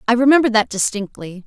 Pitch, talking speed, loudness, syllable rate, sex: 230 Hz, 165 wpm, -16 LUFS, 6.1 syllables/s, female